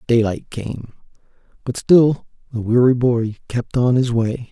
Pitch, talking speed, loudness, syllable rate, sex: 120 Hz, 145 wpm, -18 LUFS, 4.0 syllables/s, male